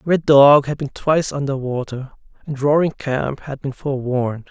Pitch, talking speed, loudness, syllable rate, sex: 140 Hz, 175 wpm, -18 LUFS, 4.9 syllables/s, male